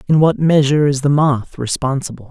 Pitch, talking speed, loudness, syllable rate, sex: 140 Hz, 180 wpm, -15 LUFS, 5.6 syllables/s, male